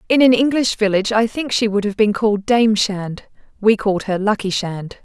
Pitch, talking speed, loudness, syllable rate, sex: 215 Hz, 215 wpm, -17 LUFS, 5.3 syllables/s, female